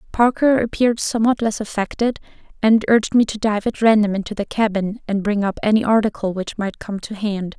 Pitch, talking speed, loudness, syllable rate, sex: 215 Hz, 200 wpm, -19 LUFS, 5.7 syllables/s, female